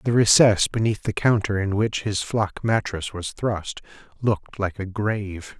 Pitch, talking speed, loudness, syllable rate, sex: 105 Hz, 170 wpm, -22 LUFS, 4.4 syllables/s, male